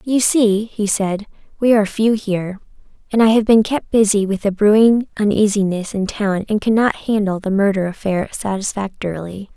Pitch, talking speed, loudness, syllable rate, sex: 205 Hz, 170 wpm, -17 LUFS, 5.1 syllables/s, female